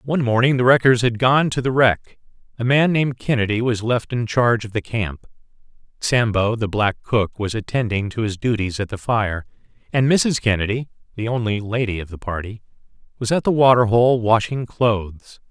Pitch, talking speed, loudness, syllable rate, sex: 115 Hz, 185 wpm, -19 LUFS, 5.2 syllables/s, male